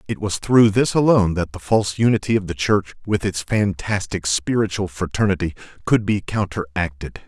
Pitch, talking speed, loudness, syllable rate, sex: 100 Hz, 165 wpm, -20 LUFS, 5.3 syllables/s, male